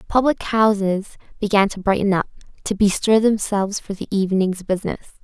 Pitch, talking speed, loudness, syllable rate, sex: 200 Hz, 150 wpm, -20 LUFS, 5.7 syllables/s, female